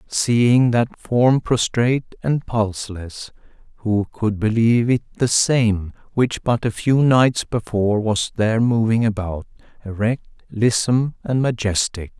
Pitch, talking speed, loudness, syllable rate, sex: 115 Hz, 130 wpm, -19 LUFS, 4.1 syllables/s, male